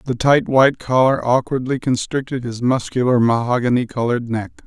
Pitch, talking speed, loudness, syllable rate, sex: 125 Hz, 140 wpm, -18 LUFS, 5.4 syllables/s, male